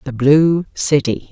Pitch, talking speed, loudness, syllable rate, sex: 140 Hz, 135 wpm, -15 LUFS, 3.7 syllables/s, female